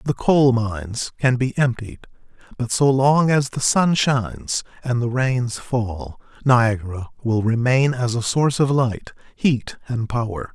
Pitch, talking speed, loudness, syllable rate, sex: 125 Hz, 160 wpm, -20 LUFS, 4.2 syllables/s, male